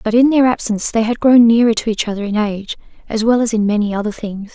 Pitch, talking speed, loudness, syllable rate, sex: 220 Hz, 265 wpm, -15 LUFS, 6.5 syllables/s, female